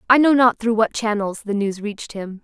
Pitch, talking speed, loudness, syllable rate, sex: 220 Hz, 245 wpm, -19 LUFS, 5.3 syllables/s, female